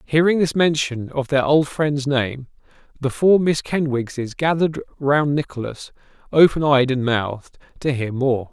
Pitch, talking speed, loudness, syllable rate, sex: 140 Hz, 155 wpm, -19 LUFS, 4.5 syllables/s, male